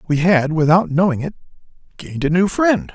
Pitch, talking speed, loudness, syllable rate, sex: 165 Hz, 185 wpm, -16 LUFS, 5.6 syllables/s, male